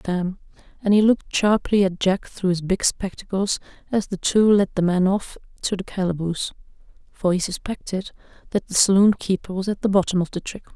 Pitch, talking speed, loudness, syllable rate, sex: 190 Hz, 195 wpm, -22 LUFS, 5.5 syllables/s, female